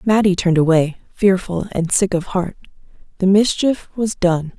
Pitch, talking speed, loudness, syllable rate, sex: 190 Hz, 155 wpm, -17 LUFS, 4.7 syllables/s, female